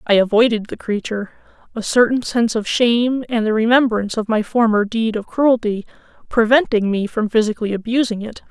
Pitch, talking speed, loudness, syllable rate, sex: 225 Hz, 170 wpm, -18 LUFS, 5.8 syllables/s, female